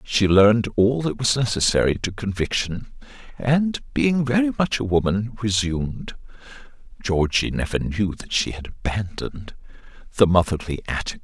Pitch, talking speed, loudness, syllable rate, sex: 105 Hz, 135 wpm, -22 LUFS, 4.1 syllables/s, male